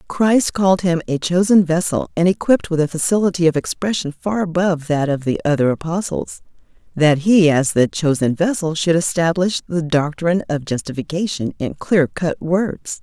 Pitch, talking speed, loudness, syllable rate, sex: 170 Hz, 165 wpm, -18 LUFS, 5.1 syllables/s, female